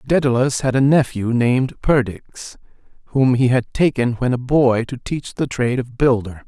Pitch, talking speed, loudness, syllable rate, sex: 125 Hz, 175 wpm, -18 LUFS, 4.7 syllables/s, male